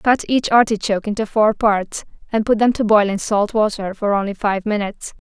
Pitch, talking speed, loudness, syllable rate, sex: 210 Hz, 205 wpm, -18 LUFS, 5.3 syllables/s, female